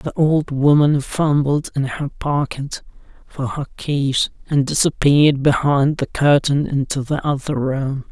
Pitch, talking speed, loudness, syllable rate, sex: 140 Hz, 140 wpm, -18 LUFS, 4.0 syllables/s, male